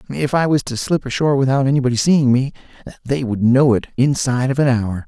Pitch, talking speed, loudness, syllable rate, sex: 130 Hz, 215 wpm, -17 LUFS, 6.2 syllables/s, male